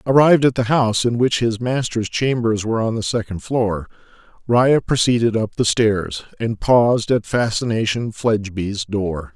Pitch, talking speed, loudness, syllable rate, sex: 110 Hz, 160 wpm, -18 LUFS, 4.7 syllables/s, male